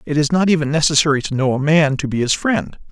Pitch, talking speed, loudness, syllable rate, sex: 145 Hz, 270 wpm, -16 LUFS, 6.3 syllables/s, male